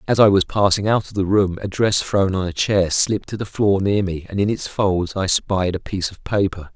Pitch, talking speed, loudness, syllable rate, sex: 95 Hz, 265 wpm, -19 LUFS, 5.2 syllables/s, male